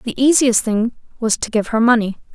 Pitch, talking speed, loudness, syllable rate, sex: 230 Hz, 205 wpm, -17 LUFS, 5.1 syllables/s, female